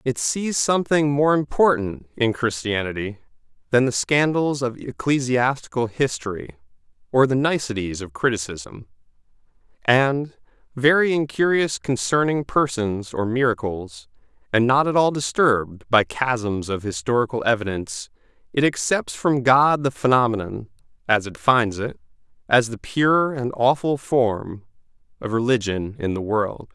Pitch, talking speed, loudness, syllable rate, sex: 120 Hz, 125 wpm, -21 LUFS, 4.5 syllables/s, male